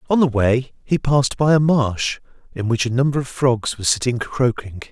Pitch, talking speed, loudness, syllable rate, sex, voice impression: 125 Hz, 210 wpm, -19 LUFS, 5.2 syllables/s, male, very masculine, very middle-aged, very thick, relaxed, weak, slightly dark, very soft, muffled, slightly raspy, very cool, very intellectual, slightly refreshing, very sincere, very calm, very mature, very friendly, very reassuring, very unique, elegant, wild, very sweet, slightly lively, kind, modest